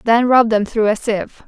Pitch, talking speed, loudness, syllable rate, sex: 225 Hz, 245 wpm, -16 LUFS, 5.1 syllables/s, female